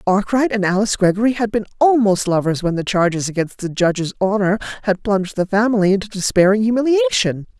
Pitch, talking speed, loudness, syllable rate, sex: 200 Hz, 175 wpm, -17 LUFS, 6.5 syllables/s, female